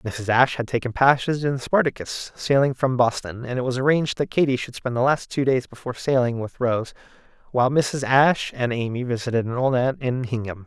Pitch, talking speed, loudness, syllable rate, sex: 125 Hz, 215 wpm, -22 LUFS, 5.8 syllables/s, male